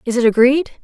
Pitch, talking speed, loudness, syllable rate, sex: 245 Hz, 215 wpm, -14 LUFS, 6.6 syllables/s, female